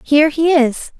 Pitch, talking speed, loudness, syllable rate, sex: 295 Hz, 180 wpm, -14 LUFS, 4.7 syllables/s, female